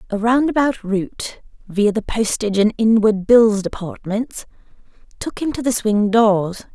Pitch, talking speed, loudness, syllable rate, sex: 220 Hz, 140 wpm, -18 LUFS, 4.4 syllables/s, female